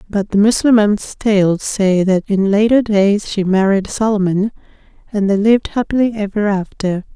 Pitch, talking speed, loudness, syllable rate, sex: 205 Hz, 150 wpm, -15 LUFS, 4.7 syllables/s, female